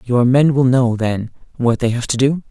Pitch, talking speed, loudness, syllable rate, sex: 125 Hz, 240 wpm, -16 LUFS, 4.8 syllables/s, male